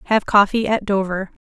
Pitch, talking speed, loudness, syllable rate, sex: 205 Hz, 165 wpm, -18 LUFS, 5.3 syllables/s, female